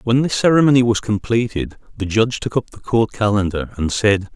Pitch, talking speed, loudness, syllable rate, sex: 110 Hz, 195 wpm, -18 LUFS, 5.6 syllables/s, male